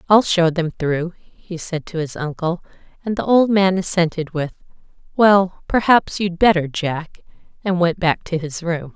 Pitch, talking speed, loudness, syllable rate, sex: 175 Hz, 175 wpm, -19 LUFS, 4.3 syllables/s, female